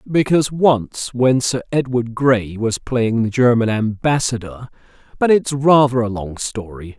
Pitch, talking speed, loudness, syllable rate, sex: 120 Hz, 135 wpm, -17 LUFS, 4.2 syllables/s, male